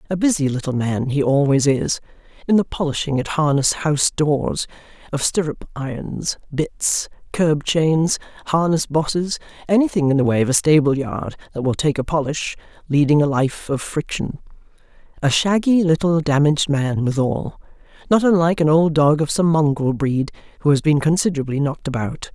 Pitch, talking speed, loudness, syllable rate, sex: 150 Hz, 165 wpm, -19 LUFS, 5.1 syllables/s, female